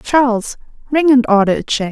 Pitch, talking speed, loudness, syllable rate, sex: 245 Hz, 190 wpm, -14 LUFS, 5.0 syllables/s, female